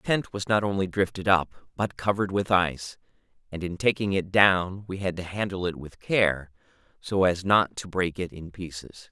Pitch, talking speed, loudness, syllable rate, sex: 95 Hz, 205 wpm, -26 LUFS, 5.0 syllables/s, male